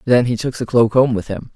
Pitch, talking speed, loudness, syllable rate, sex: 120 Hz, 310 wpm, -16 LUFS, 5.7 syllables/s, male